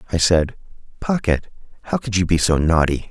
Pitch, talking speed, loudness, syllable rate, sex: 90 Hz, 175 wpm, -19 LUFS, 5.4 syllables/s, male